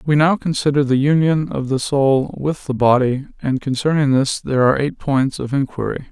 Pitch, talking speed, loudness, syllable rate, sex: 140 Hz, 195 wpm, -18 LUFS, 5.3 syllables/s, male